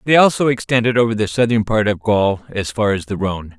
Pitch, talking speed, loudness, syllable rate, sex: 110 Hz, 235 wpm, -17 LUFS, 5.9 syllables/s, male